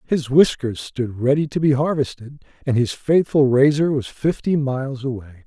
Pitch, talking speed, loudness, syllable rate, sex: 135 Hz, 165 wpm, -19 LUFS, 4.9 syllables/s, male